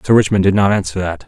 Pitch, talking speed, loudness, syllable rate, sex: 95 Hz, 280 wpm, -15 LUFS, 7.1 syllables/s, male